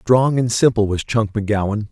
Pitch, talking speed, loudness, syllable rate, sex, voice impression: 110 Hz, 190 wpm, -18 LUFS, 5.4 syllables/s, male, masculine, adult-like, slightly weak, fluent, intellectual, sincere, slightly friendly, reassuring, kind, slightly modest